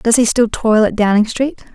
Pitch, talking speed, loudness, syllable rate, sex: 230 Hz, 240 wpm, -14 LUFS, 4.9 syllables/s, female